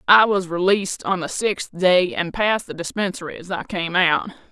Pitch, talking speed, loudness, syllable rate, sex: 185 Hz, 200 wpm, -20 LUFS, 5.0 syllables/s, female